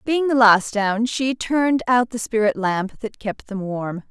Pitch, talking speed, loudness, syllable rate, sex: 225 Hz, 205 wpm, -20 LUFS, 4.1 syllables/s, female